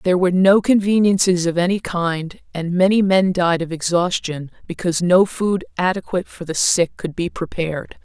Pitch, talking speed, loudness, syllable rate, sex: 180 Hz, 170 wpm, -18 LUFS, 5.2 syllables/s, female